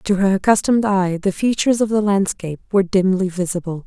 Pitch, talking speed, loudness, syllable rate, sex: 195 Hz, 185 wpm, -18 LUFS, 6.3 syllables/s, female